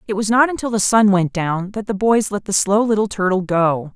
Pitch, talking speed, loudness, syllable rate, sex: 205 Hz, 260 wpm, -17 LUFS, 5.3 syllables/s, female